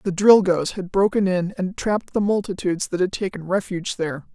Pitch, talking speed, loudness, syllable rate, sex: 190 Hz, 195 wpm, -21 LUFS, 5.8 syllables/s, female